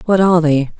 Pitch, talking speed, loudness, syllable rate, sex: 165 Hz, 225 wpm, -13 LUFS, 6.6 syllables/s, female